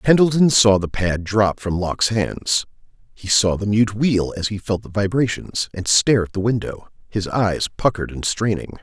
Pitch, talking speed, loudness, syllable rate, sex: 105 Hz, 190 wpm, -19 LUFS, 4.8 syllables/s, male